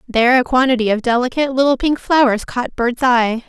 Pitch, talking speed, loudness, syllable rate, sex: 250 Hz, 190 wpm, -15 LUFS, 5.8 syllables/s, female